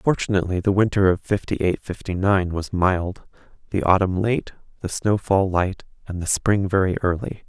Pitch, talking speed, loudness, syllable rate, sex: 95 Hz, 160 wpm, -22 LUFS, 5.0 syllables/s, male